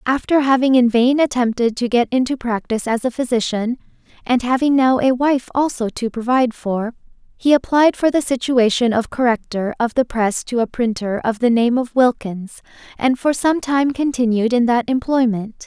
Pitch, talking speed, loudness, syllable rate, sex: 245 Hz, 180 wpm, -17 LUFS, 5.1 syllables/s, female